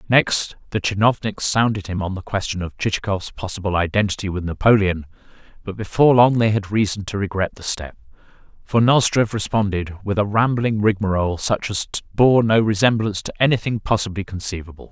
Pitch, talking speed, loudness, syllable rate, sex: 105 Hz, 160 wpm, -20 LUFS, 5.7 syllables/s, male